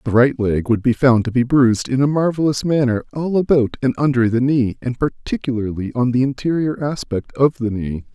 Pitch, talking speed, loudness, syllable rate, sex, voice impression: 130 Hz, 205 wpm, -18 LUFS, 5.3 syllables/s, male, masculine, adult-like, thick, tensed, powerful, slightly soft, slightly muffled, sincere, calm, friendly, reassuring, slightly wild, kind, slightly modest